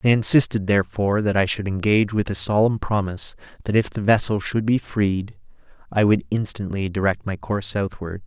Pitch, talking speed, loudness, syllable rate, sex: 100 Hz, 180 wpm, -21 LUFS, 5.6 syllables/s, male